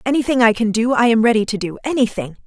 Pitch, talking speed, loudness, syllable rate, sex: 230 Hz, 245 wpm, -16 LUFS, 6.7 syllables/s, female